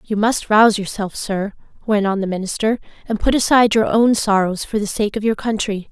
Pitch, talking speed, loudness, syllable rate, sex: 210 Hz, 215 wpm, -18 LUFS, 5.6 syllables/s, female